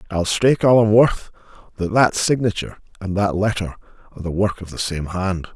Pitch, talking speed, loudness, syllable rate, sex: 100 Hz, 195 wpm, -19 LUFS, 5.8 syllables/s, male